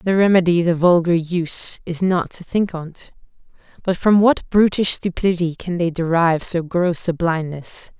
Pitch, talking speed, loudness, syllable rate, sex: 175 Hz, 165 wpm, -18 LUFS, 4.7 syllables/s, female